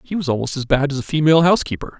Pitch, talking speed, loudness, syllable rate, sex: 145 Hz, 270 wpm, -18 LUFS, 7.9 syllables/s, male